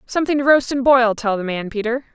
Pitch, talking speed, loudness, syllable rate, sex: 245 Hz, 250 wpm, -18 LUFS, 6.1 syllables/s, female